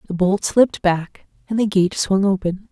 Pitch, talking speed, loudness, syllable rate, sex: 195 Hz, 200 wpm, -19 LUFS, 4.7 syllables/s, female